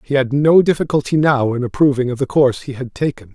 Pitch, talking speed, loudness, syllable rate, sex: 135 Hz, 235 wpm, -16 LUFS, 6.2 syllables/s, male